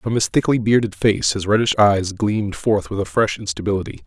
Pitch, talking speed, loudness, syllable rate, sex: 100 Hz, 205 wpm, -19 LUFS, 5.5 syllables/s, male